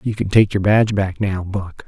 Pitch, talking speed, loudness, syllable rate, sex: 100 Hz, 255 wpm, -18 LUFS, 5.1 syllables/s, male